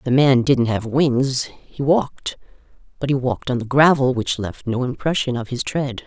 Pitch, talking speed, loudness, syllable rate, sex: 130 Hz, 200 wpm, -20 LUFS, 4.8 syllables/s, female